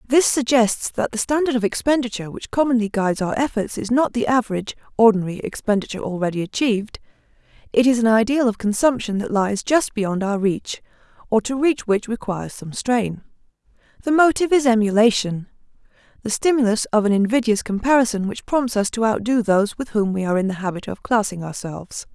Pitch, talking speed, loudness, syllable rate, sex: 225 Hz, 175 wpm, -20 LUFS, 6.0 syllables/s, female